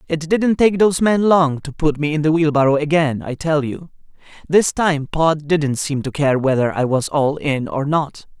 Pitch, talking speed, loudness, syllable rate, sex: 150 Hz, 215 wpm, -17 LUFS, 4.6 syllables/s, male